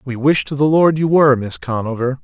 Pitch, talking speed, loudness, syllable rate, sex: 135 Hz, 270 wpm, -15 LUFS, 6.2 syllables/s, male